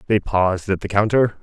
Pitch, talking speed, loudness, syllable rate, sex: 100 Hz, 210 wpm, -19 LUFS, 5.8 syllables/s, male